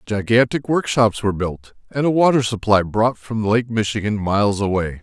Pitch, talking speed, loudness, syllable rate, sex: 110 Hz, 180 wpm, -19 LUFS, 5.0 syllables/s, male